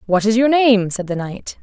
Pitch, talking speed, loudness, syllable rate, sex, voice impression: 215 Hz, 260 wpm, -16 LUFS, 4.8 syllables/s, female, very feminine, slightly young, slightly adult-like, very thin, tensed, slightly powerful, very bright, hard, very clear, very fluent, very cute, intellectual, very refreshing, slightly sincere, slightly calm, very friendly, very reassuring, very unique, elegant, slightly wild, sweet, very lively, slightly strict, slightly intense, light